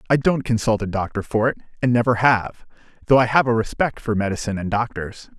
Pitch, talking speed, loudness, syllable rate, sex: 115 Hz, 210 wpm, -20 LUFS, 6.1 syllables/s, male